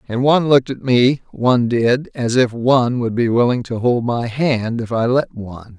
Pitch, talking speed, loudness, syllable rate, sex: 120 Hz, 220 wpm, -17 LUFS, 4.9 syllables/s, male